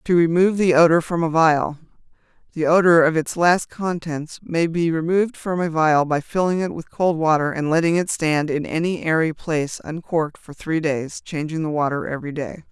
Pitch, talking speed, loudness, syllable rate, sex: 160 Hz, 195 wpm, -20 LUFS, 5.2 syllables/s, female